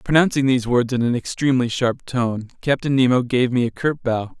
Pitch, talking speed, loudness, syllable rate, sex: 125 Hz, 205 wpm, -20 LUFS, 5.5 syllables/s, male